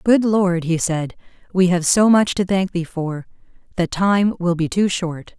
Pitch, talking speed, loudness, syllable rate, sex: 180 Hz, 200 wpm, -18 LUFS, 4.1 syllables/s, female